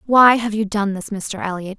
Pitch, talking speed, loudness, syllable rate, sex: 210 Hz, 235 wpm, -18 LUFS, 4.9 syllables/s, female